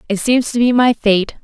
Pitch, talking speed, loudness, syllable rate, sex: 230 Hz, 250 wpm, -14 LUFS, 5.0 syllables/s, female